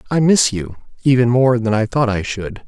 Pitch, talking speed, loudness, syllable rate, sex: 120 Hz, 200 wpm, -16 LUFS, 5.1 syllables/s, male